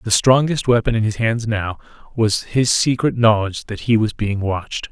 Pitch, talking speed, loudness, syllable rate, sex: 110 Hz, 195 wpm, -18 LUFS, 5.0 syllables/s, male